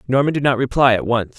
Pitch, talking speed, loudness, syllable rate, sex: 125 Hz, 260 wpm, -17 LUFS, 6.5 syllables/s, male